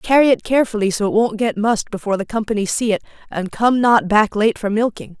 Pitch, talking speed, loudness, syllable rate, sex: 215 Hz, 230 wpm, -17 LUFS, 6.2 syllables/s, female